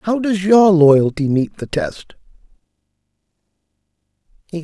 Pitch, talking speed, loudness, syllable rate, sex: 175 Hz, 90 wpm, -15 LUFS, 3.7 syllables/s, male